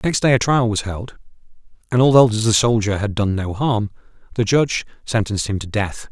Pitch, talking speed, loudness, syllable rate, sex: 110 Hz, 195 wpm, -18 LUFS, 5.4 syllables/s, male